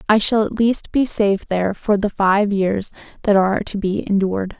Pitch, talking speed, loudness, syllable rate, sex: 205 Hz, 210 wpm, -18 LUFS, 5.2 syllables/s, female